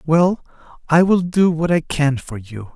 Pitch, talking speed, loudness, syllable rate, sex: 155 Hz, 195 wpm, -17 LUFS, 4.1 syllables/s, male